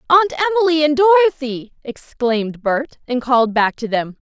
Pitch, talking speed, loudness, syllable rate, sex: 280 Hz, 155 wpm, -17 LUFS, 5.7 syllables/s, female